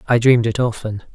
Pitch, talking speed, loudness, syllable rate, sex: 115 Hz, 210 wpm, -17 LUFS, 6.5 syllables/s, male